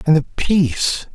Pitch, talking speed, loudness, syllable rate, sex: 155 Hz, 160 wpm, -18 LUFS, 4.5 syllables/s, male